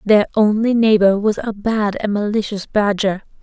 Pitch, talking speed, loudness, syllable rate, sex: 210 Hz, 160 wpm, -17 LUFS, 4.6 syllables/s, female